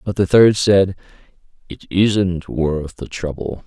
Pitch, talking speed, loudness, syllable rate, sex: 90 Hz, 145 wpm, -17 LUFS, 3.6 syllables/s, male